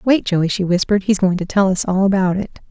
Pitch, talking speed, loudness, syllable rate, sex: 190 Hz, 265 wpm, -17 LUFS, 5.9 syllables/s, female